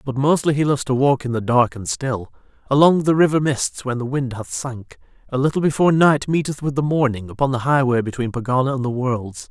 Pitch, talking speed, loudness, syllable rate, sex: 135 Hz, 225 wpm, -19 LUFS, 5.8 syllables/s, male